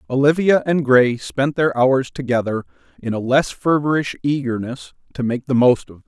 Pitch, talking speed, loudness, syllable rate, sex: 130 Hz, 180 wpm, -18 LUFS, 5.0 syllables/s, male